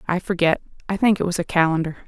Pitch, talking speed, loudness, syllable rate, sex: 175 Hz, 230 wpm, -21 LUFS, 7.1 syllables/s, female